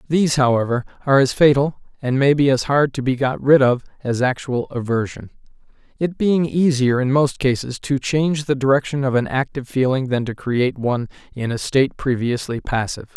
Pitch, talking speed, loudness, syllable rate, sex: 135 Hz, 185 wpm, -19 LUFS, 5.6 syllables/s, male